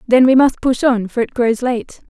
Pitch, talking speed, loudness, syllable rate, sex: 245 Hz, 255 wpm, -15 LUFS, 4.9 syllables/s, female